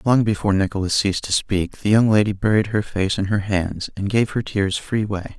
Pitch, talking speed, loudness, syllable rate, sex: 100 Hz, 235 wpm, -20 LUFS, 5.4 syllables/s, male